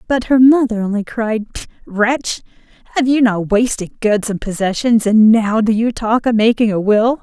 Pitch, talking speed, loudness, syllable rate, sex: 225 Hz, 185 wpm, -15 LUFS, 4.8 syllables/s, female